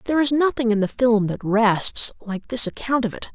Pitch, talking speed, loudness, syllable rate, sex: 230 Hz, 235 wpm, -20 LUFS, 5.2 syllables/s, female